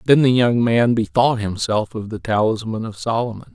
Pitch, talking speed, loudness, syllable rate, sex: 115 Hz, 185 wpm, -19 LUFS, 5.0 syllables/s, male